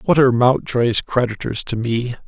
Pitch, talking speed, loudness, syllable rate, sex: 120 Hz, 160 wpm, -18 LUFS, 4.9 syllables/s, male